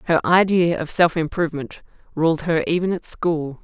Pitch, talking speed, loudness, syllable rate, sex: 165 Hz, 165 wpm, -20 LUFS, 4.8 syllables/s, female